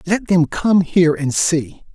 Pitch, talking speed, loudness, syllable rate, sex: 170 Hz, 185 wpm, -16 LUFS, 4.1 syllables/s, male